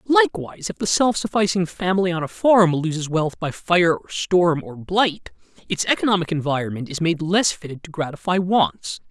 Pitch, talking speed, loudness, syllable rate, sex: 175 Hz, 180 wpm, -20 LUFS, 5.1 syllables/s, male